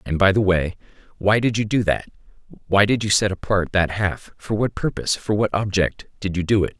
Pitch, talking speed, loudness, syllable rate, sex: 100 Hz, 220 wpm, -21 LUFS, 5.3 syllables/s, male